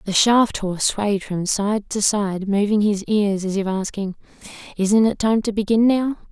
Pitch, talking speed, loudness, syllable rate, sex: 205 Hz, 190 wpm, -20 LUFS, 4.4 syllables/s, female